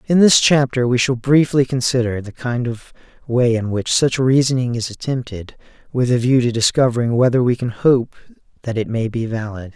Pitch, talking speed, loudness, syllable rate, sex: 125 Hz, 190 wpm, -17 LUFS, 5.2 syllables/s, male